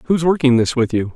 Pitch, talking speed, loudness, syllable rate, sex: 135 Hz, 260 wpm, -16 LUFS, 6.2 syllables/s, male